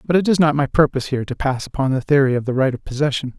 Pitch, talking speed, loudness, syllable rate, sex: 140 Hz, 300 wpm, -19 LUFS, 7.3 syllables/s, male